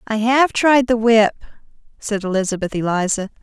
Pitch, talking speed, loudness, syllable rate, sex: 220 Hz, 140 wpm, -17 LUFS, 5.1 syllables/s, female